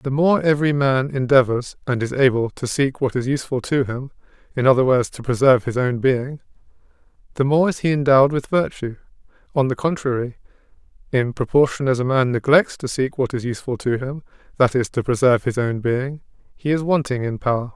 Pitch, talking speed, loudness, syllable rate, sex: 130 Hz, 190 wpm, -20 LUFS, 5.8 syllables/s, male